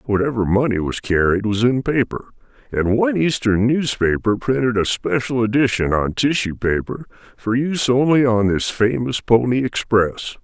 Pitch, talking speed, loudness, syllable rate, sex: 115 Hz, 150 wpm, -18 LUFS, 4.9 syllables/s, male